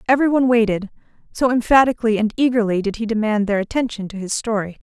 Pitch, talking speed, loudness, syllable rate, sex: 225 Hz, 170 wpm, -19 LUFS, 6.6 syllables/s, female